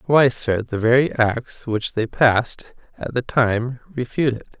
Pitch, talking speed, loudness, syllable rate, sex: 120 Hz, 170 wpm, -20 LUFS, 4.1 syllables/s, male